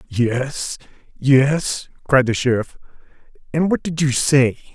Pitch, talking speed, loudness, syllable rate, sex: 135 Hz, 125 wpm, -19 LUFS, 3.5 syllables/s, male